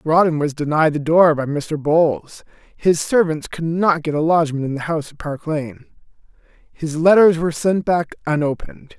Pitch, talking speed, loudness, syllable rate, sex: 160 Hz, 180 wpm, -18 LUFS, 4.9 syllables/s, male